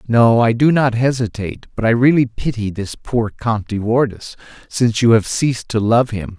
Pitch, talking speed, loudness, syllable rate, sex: 115 Hz, 195 wpm, -16 LUFS, 5.1 syllables/s, male